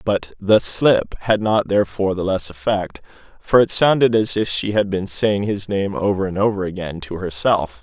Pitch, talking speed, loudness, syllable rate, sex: 100 Hz, 200 wpm, -19 LUFS, 4.8 syllables/s, male